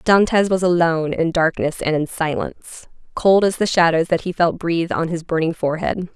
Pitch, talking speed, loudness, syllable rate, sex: 170 Hz, 185 wpm, -18 LUFS, 5.4 syllables/s, female